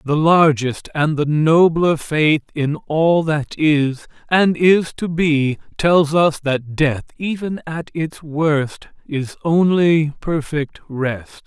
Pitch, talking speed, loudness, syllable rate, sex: 155 Hz, 135 wpm, -17 LUFS, 3.1 syllables/s, male